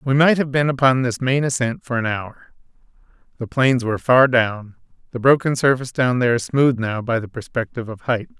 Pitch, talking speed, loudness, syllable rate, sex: 125 Hz, 200 wpm, -19 LUFS, 5.5 syllables/s, male